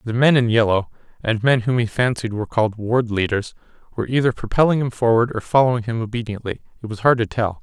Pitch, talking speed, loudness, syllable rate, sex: 115 Hz, 215 wpm, -19 LUFS, 6.4 syllables/s, male